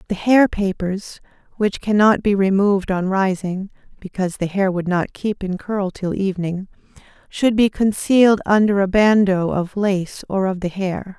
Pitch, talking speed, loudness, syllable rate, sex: 195 Hz, 165 wpm, -18 LUFS, 3.4 syllables/s, female